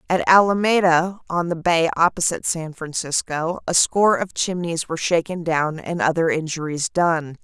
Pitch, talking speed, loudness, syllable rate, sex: 170 Hz, 155 wpm, -20 LUFS, 4.9 syllables/s, female